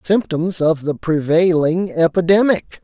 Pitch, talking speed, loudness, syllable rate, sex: 170 Hz, 105 wpm, -16 LUFS, 4.0 syllables/s, male